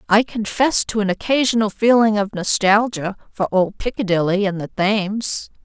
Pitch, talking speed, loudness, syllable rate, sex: 205 Hz, 150 wpm, -18 LUFS, 5.0 syllables/s, female